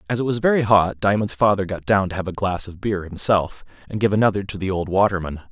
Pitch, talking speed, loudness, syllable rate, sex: 100 Hz, 250 wpm, -20 LUFS, 6.2 syllables/s, male